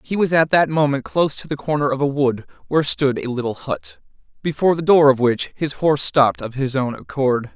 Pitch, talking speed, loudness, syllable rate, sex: 140 Hz, 230 wpm, -19 LUFS, 5.8 syllables/s, male